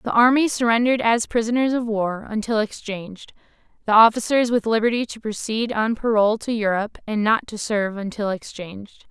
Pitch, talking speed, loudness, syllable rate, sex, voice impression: 220 Hz, 165 wpm, -21 LUFS, 5.6 syllables/s, female, slightly feminine, slightly adult-like, clear, refreshing, slightly calm, friendly, kind